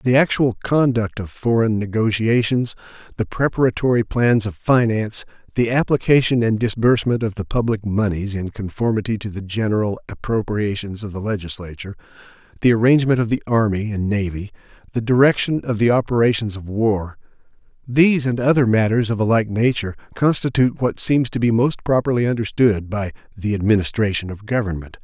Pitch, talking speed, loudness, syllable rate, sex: 110 Hz, 150 wpm, -19 LUFS, 5.7 syllables/s, male